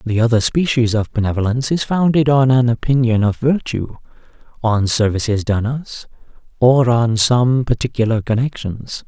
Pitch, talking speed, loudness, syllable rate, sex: 120 Hz, 140 wpm, -16 LUFS, 4.9 syllables/s, male